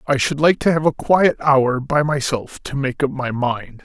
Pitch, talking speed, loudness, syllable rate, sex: 140 Hz, 235 wpm, -18 LUFS, 4.4 syllables/s, male